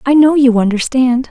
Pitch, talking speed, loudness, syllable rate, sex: 260 Hz, 185 wpm, -11 LUFS, 5.0 syllables/s, female